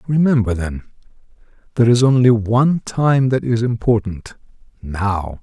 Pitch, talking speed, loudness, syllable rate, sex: 115 Hz, 110 wpm, -16 LUFS, 4.6 syllables/s, male